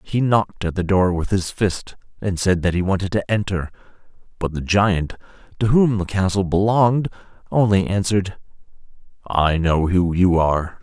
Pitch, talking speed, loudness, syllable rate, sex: 95 Hz, 165 wpm, -19 LUFS, 5.0 syllables/s, male